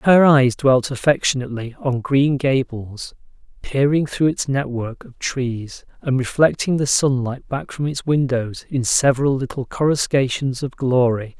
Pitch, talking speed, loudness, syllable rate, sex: 135 Hz, 140 wpm, -19 LUFS, 4.3 syllables/s, male